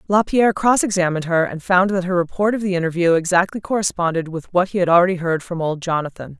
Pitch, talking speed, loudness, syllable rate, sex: 180 Hz, 215 wpm, -18 LUFS, 6.4 syllables/s, female